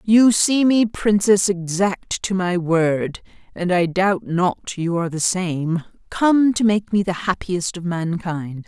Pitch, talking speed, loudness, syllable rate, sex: 185 Hz, 165 wpm, -19 LUFS, 3.6 syllables/s, female